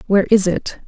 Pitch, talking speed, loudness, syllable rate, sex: 200 Hz, 205 wpm, -16 LUFS, 5.8 syllables/s, female